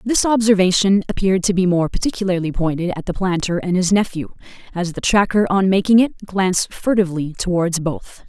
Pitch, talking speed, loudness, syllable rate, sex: 185 Hz, 175 wpm, -18 LUFS, 5.8 syllables/s, female